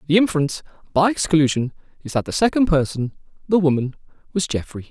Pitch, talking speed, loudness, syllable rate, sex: 160 Hz, 135 wpm, -20 LUFS, 6.3 syllables/s, male